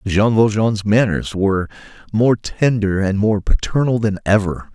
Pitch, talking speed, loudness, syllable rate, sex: 105 Hz, 140 wpm, -17 LUFS, 4.4 syllables/s, male